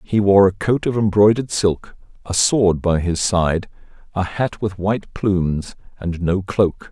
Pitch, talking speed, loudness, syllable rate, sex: 95 Hz, 175 wpm, -18 LUFS, 4.3 syllables/s, male